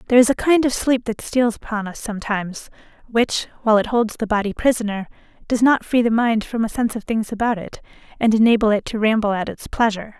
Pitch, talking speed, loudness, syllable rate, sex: 225 Hz, 225 wpm, -19 LUFS, 6.3 syllables/s, female